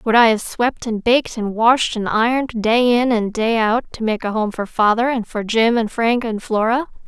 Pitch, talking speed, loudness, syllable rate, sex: 230 Hz, 235 wpm, -18 LUFS, 4.9 syllables/s, female